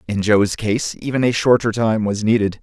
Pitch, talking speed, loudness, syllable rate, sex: 110 Hz, 205 wpm, -18 LUFS, 4.9 syllables/s, male